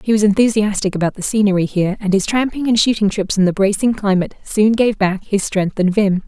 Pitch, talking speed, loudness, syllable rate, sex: 205 Hz, 230 wpm, -16 LUFS, 6.0 syllables/s, female